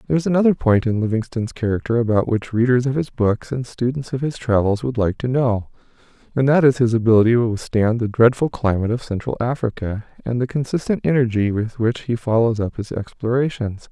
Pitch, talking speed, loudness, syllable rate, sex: 120 Hz, 200 wpm, -19 LUFS, 5.9 syllables/s, male